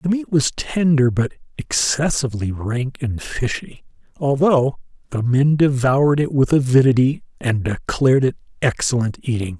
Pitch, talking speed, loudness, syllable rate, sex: 135 Hz, 130 wpm, -19 LUFS, 4.6 syllables/s, male